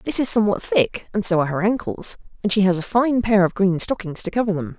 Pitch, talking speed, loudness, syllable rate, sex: 205 Hz, 265 wpm, -20 LUFS, 6.1 syllables/s, female